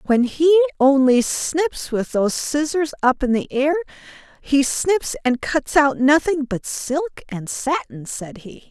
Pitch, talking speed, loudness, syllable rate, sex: 285 Hz, 160 wpm, -19 LUFS, 3.8 syllables/s, female